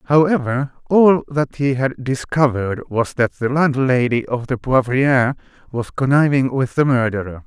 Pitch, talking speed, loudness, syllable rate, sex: 130 Hz, 145 wpm, -18 LUFS, 4.6 syllables/s, male